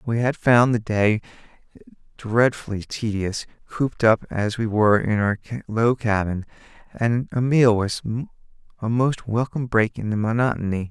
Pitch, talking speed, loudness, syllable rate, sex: 110 Hz, 150 wpm, -22 LUFS, 4.6 syllables/s, male